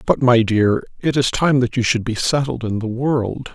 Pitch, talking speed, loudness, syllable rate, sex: 125 Hz, 235 wpm, -18 LUFS, 4.6 syllables/s, male